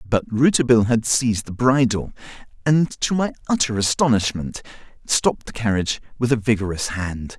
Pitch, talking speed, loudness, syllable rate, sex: 115 Hz, 145 wpm, -20 LUFS, 5.5 syllables/s, male